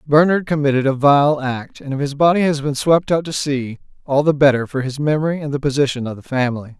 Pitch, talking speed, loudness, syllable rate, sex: 140 Hz, 240 wpm, -17 LUFS, 5.9 syllables/s, male